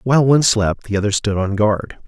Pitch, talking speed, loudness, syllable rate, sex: 110 Hz, 230 wpm, -17 LUFS, 5.7 syllables/s, male